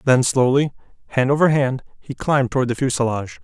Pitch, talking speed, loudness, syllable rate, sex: 130 Hz, 175 wpm, -19 LUFS, 6.3 syllables/s, male